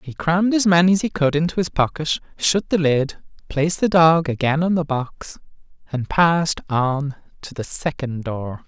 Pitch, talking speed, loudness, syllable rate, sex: 155 Hz, 185 wpm, -20 LUFS, 4.8 syllables/s, male